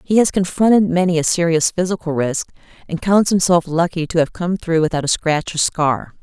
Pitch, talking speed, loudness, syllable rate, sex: 170 Hz, 200 wpm, -17 LUFS, 5.3 syllables/s, female